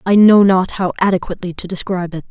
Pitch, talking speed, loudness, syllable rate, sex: 185 Hz, 210 wpm, -15 LUFS, 6.8 syllables/s, female